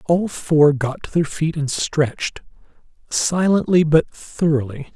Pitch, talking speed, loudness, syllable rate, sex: 155 Hz, 135 wpm, -19 LUFS, 3.8 syllables/s, male